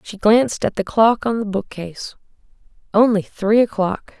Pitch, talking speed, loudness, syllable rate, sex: 210 Hz, 145 wpm, -18 LUFS, 4.9 syllables/s, female